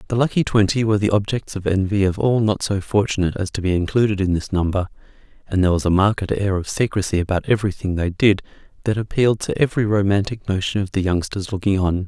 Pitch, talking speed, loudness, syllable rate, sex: 100 Hz, 215 wpm, -20 LUFS, 6.5 syllables/s, male